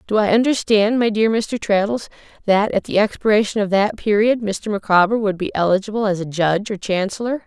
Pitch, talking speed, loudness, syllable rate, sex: 210 Hz, 195 wpm, -18 LUFS, 5.6 syllables/s, female